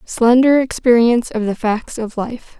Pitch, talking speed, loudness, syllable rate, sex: 235 Hz, 160 wpm, -15 LUFS, 4.4 syllables/s, female